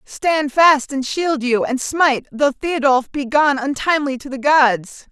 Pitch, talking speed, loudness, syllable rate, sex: 275 Hz, 175 wpm, -17 LUFS, 4.0 syllables/s, female